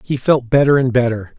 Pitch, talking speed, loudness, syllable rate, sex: 125 Hz, 215 wpm, -15 LUFS, 5.5 syllables/s, male